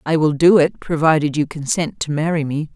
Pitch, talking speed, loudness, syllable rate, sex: 155 Hz, 220 wpm, -17 LUFS, 5.3 syllables/s, female